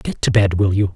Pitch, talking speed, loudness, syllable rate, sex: 95 Hz, 315 wpm, -17 LUFS, 5.6 syllables/s, male